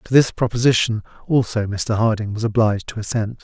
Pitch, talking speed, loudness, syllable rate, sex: 110 Hz, 175 wpm, -19 LUFS, 5.8 syllables/s, male